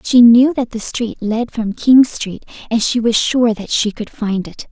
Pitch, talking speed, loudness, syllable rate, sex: 230 Hz, 230 wpm, -15 LUFS, 4.2 syllables/s, female